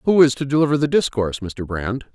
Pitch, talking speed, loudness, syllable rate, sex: 130 Hz, 225 wpm, -19 LUFS, 6.0 syllables/s, male